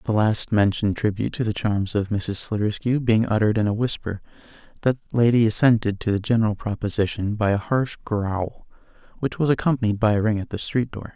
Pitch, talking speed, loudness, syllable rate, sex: 110 Hz, 195 wpm, -22 LUFS, 5.8 syllables/s, male